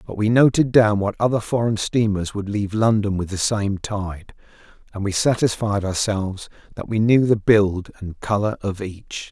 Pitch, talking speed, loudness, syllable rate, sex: 105 Hz, 180 wpm, -20 LUFS, 4.8 syllables/s, male